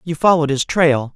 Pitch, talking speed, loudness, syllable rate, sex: 155 Hz, 210 wpm, -16 LUFS, 5.7 syllables/s, male